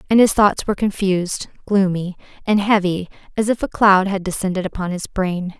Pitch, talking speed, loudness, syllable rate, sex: 195 Hz, 180 wpm, -18 LUFS, 5.4 syllables/s, female